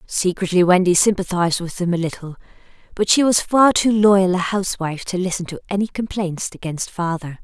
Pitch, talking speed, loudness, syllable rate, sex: 185 Hz, 180 wpm, -18 LUFS, 5.6 syllables/s, female